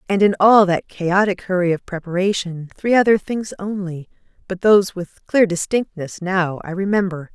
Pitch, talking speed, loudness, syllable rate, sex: 190 Hz, 165 wpm, -18 LUFS, 4.9 syllables/s, female